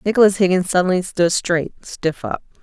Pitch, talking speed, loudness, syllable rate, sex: 185 Hz, 160 wpm, -18 LUFS, 5.1 syllables/s, female